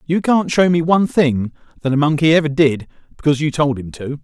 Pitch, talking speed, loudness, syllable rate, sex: 150 Hz, 225 wpm, -16 LUFS, 5.9 syllables/s, male